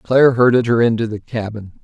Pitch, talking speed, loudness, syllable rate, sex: 115 Hz, 195 wpm, -16 LUFS, 5.6 syllables/s, male